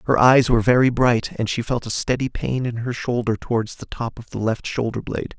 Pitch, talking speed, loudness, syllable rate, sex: 115 Hz, 245 wpm, -21 LUFS, 5.6 syllables/s, male